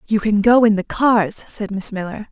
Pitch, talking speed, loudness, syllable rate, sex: 210 Hz, 235 wpm, -17 LUFS, 4.7 syllables/s, female